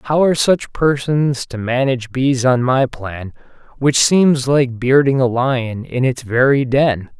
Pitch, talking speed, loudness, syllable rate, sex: 130 Hz, 165 wpm, -16 LUFS, 3.9 syllables/s, male